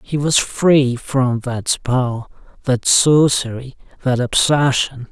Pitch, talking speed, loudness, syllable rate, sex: 130 Hz, 115 wpm, -16 LUFS, 3.2 syllables/s, male